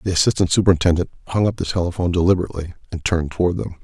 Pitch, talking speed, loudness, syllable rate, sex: 90 Hz, 190 wpm, -19 LUFS, 8.8 syllables/s, male